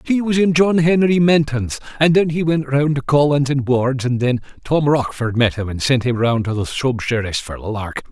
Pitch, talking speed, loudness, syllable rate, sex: 135 Hz, 230 wpm, -17 LUFS, 5.0 syllables/s, male